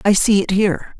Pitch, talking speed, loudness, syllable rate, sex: 195 Hz, 240 wpm, -16 LUFS, 5.8 syllables/s, female